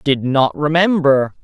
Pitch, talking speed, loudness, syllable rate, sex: 145 Hz, 125 wpm, -15 LUFS, 3.7 syllables/s, male